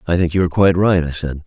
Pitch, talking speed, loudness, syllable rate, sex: 85 Hz, 330 wpm, -16 LUFS, 7.6 syllables/s, male